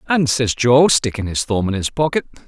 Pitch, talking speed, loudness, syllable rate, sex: 125 Hz, 220 wpm, -17 LUFS, 5.1 syllables/s, male